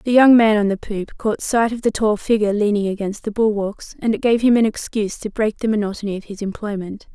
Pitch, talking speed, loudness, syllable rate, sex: 215 Hz, 245 wpm, -19 LUFS, 5.9 syllables/s, female